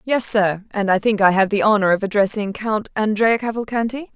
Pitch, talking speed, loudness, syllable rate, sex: 210 Hz, 200 wpm, -18 LUFS, 5.4 syllables/s, female